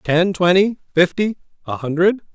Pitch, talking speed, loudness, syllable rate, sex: 180 Hz, 130 wpm, -17 LUFS, 4.8 syllables/s, male